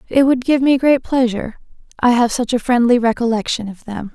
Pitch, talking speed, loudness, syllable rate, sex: 240 Hz, 205 wpm, -16 LUFS, 5.6 syllables/s, female